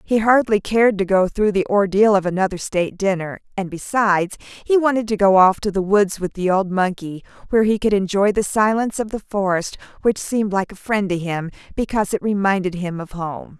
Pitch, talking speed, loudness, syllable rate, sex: 200 Hz, 210 wpm, -19 LUFS, 5.5 syllables/s, female